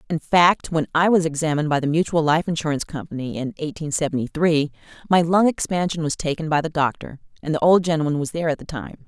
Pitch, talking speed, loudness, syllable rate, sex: 160 Hz, 220 wpm, -21 LUFS, 6.4 syllables/s, female